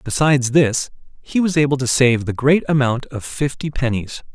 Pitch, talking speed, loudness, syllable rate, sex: 135 Hz, 180 wpm, -18 LUFS, 5.0 syllables/s, male